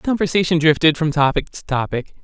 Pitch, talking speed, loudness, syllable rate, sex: 160 Hz, 190 wpm, -18 LUFS, 6.1 syllables/s, male